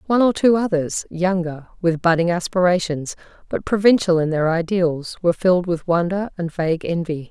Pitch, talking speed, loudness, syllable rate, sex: 175 Hz, 165 wpm, -19 LUFS, 5.4 syllables/s, female